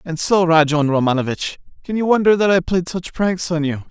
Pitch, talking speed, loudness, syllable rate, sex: 170 Hz, 215 wpm, -17 LUFS, 5.4 syllables/s, male